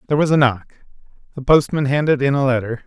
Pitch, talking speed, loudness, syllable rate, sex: 135 Hz, 210 wpm, -17 LUFS, 6.4 syllables/s, male